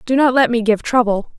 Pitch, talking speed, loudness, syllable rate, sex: 235 Hz, 260 wpm, -15 LUFS, 5.6 syllables/s, female